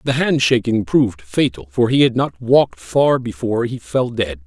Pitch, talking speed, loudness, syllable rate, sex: 115 Hz, 200 wpm, -17 LUFS, 4.9 syllables/s, male